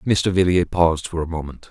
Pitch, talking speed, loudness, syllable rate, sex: 85 Hz, 210 wpm, -20 LUFS, 6.0 syllables/s, male